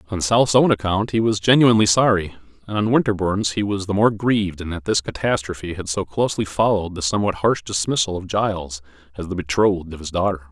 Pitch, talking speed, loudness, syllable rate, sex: 95 Hz, 205 wpm, -20 LUFS, 6.3 syllables/s, male